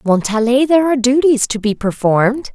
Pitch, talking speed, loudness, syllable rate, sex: 245 Hz, 165 wpm, -14 LUFS, 5.7 syllables/s, female